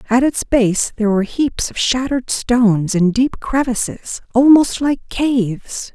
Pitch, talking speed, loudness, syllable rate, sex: 240 Hz, 150 wpm, -16 LUFS, 4.4 syllables/s, female